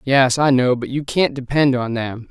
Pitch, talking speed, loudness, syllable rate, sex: 130 Hz, 235 wpm, -18 LUFS, 4.6 syllables/s, male